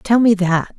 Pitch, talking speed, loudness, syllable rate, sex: 200 Hz, 230 wpm, -15 LUFS, 4.1 syllables/s, female